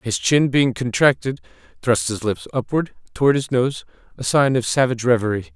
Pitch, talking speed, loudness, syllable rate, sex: 120 Hz, 175 wpm, -19 LUFS, 5.3 syllables/s, male